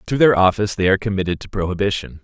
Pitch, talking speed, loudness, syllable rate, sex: 95 Hz, 215 wpm, -18 LUFS, 7.7 syllables/s, male